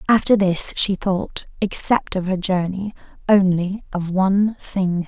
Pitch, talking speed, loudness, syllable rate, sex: 190 Hz, 140 wpm, -19 LUFS, 3.3 syllables/s, female